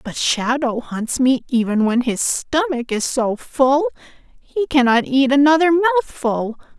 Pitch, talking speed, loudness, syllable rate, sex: 265 Hz, 140 wpm, -18 LUFS, 3.9 syllables/s, female